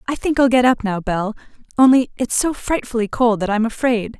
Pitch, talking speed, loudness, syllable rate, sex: 235 Hz, 215 wpm, -18 LUFS, 5.4 syllables/s, female